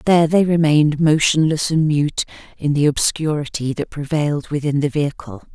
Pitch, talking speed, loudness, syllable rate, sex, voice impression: 150 Hz, 150 wpm, -18 LUFS, 5.4 syllables/s, female, feminine, slightly middle-aged, slightly powerful, clear, slightly halting, intellectual, calm, elegant, slightly strict, sharp